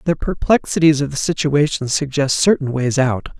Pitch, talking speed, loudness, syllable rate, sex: 145 Hz, 160 wpm, -17 LUFS, 5.0 syllables/s, male